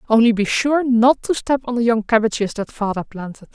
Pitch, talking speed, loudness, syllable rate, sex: 230 Hz, 220 wpm, -18 LUFS, 5.5 syllables/s, female